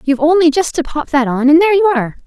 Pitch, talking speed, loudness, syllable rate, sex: 305 Hz, 290 wpm, -13 LUFS, 7.1 syllables/s, female